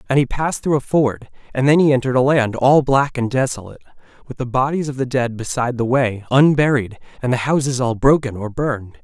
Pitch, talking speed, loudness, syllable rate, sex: 130 Hz, 220 wpm, -18 LUFS, 6.0 syllables/s, male